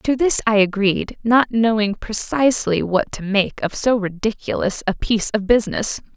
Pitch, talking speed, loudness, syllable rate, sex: 215 Hz, 165 wpm, -19 LUFS, 4.8 syllables/s, female